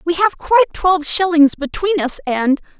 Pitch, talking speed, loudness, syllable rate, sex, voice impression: 335 Hz, 170 wpm, -16 LUFS, 4.9 syllables/s, female, feminine, slightly young, slightly adult-like, slightly relaxed, bright, slightly soft, muffled, slightly cute, friendly, slightly kind